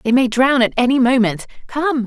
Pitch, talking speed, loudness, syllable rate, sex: 245 Hz, 205 wpm, -16 LUFS, 5.2 syllables/s, female